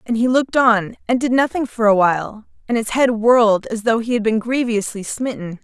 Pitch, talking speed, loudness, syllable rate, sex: 230 Hz, 225 wpm, -17 LUFS, 5.4 syllables/s, female